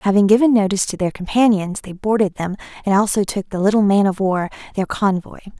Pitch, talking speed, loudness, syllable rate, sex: 200 Hz, 205 wpm, -18 LUFS, 6.0 syllables/s, female